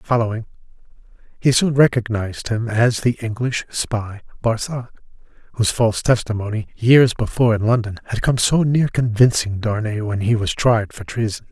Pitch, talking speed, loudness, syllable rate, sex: 115 Hz, 150 wpm, -19 LUFS, 5.2 syllables/s, male